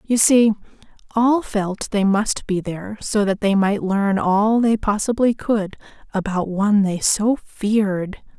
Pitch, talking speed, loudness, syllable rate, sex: 205 Hz, 155 wpm, -19 LUFS, 3.9 syllables/s, female